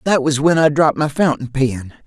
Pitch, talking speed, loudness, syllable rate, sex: 145 Hz, 230 wpm, -16 LUFS, 5.2 syllables/s, male